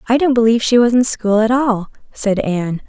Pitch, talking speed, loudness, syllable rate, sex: 225 Hz, 230 wpm, -15 LUFS, 5.8 syllables/s, female